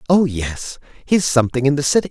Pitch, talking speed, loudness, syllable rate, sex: 140 Hz, 200 wpm, -17 LUFS, 5.6 syllables/s, male